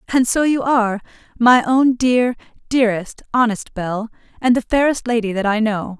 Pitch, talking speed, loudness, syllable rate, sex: 235 Hz, 150 wpm, -17 LUFS, 5.1 syllables/s, female